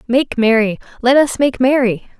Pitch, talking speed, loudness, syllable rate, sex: 245 Hz, 165 wpm, -15 LUFS, 4.7 syllables/s, female